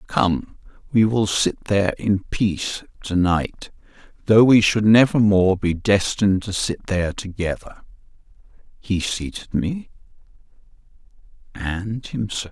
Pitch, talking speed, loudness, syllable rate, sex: 100 Hz, 120 wpm, -20 LUFS, 4.1 syllables/s, male